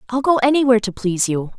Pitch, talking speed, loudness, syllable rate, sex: 230 Hz, 225 wpm, -17 LUFS, 7.4 syllables/s, female